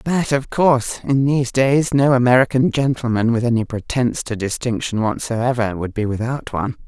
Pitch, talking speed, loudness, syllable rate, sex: 125 Hz, 165 wpm, -18 LUFS, 5.3 syllables/s, female